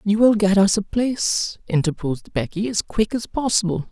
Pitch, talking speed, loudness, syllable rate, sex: 200 Hz, 185 wpm, -20 LUFS, 5.1 syllables/s, female